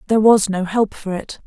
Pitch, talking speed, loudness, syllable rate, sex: 205 Hz, 245 wpm, -17 LUFS, 5.7 syllables/s, female